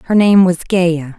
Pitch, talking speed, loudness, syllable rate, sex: 175 Hz, 200 wpm, -12 LUFS, 4.6 syllables/s, female